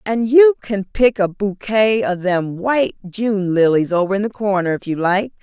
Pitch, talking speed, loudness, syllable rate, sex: 205 Hz, 200 wpm, -17 LUFS, 4.5 syllables/s, female